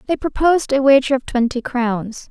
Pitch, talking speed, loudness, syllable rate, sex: 260 Hz, 180 wpm, -17 LUFS, 5.2 syllables/s, female